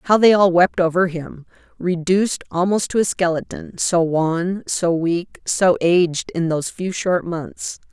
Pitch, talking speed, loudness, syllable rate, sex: 175 Hz, 160 wpm, -19 LUFS, 4.1 syllables/s, female